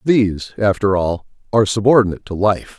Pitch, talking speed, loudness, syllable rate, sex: 100 Hz, 150 wpm, -17 LUFS, 5.9 syllables/s, male